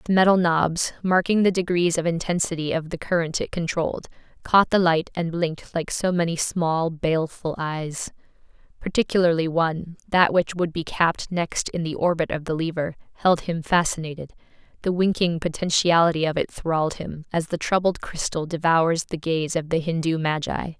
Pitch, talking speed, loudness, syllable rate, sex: 165 Hz, 170 wpm, -23 LUFS, 5.1 syllables/s, female